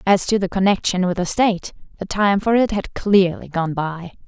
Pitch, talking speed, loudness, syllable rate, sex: 190 Hz, 210 wpm, -19 LUFS, 5.0 syllables/s, female